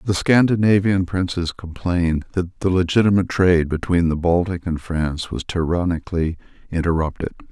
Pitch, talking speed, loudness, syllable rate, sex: 90 Hz, 130 wpm, -20 LUFS, 5.5 syllables/s, male